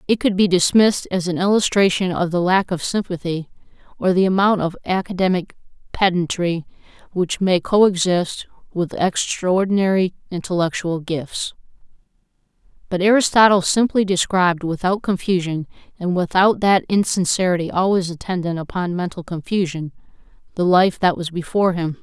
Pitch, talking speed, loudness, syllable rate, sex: 180 Hz, 125 wpm, -19 LUFS, 5.1 syllables/s, female